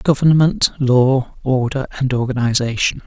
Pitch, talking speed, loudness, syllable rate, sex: 130 Hz, 100 wpm, -16 LUFS, 4.2 syllables/s, male